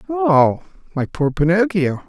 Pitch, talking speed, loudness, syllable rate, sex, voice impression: 180 Hz, 115 wpm, -17 LUFS, 3.8 syllables/s, male, very masculine, very adult-like, slightly old, thin, slightly tensed, powerful, bright, slightly soft, slightly clear, slightly halting, cool, very intellectual, refreshing, very sincere, very calm, very mature, friendly, very reassuring, unique, slightly elegant, very wild, slightly sweet, slightly lively, very kind